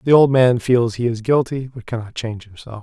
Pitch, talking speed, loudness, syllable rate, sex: 120 Hz, 235 wpm, -18 LUFS, 5.6 syllables/s, male